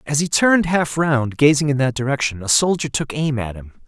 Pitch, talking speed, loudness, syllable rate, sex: 140 Hz, 230 wpm, -18 LUFS, 5.5 syllables/s, male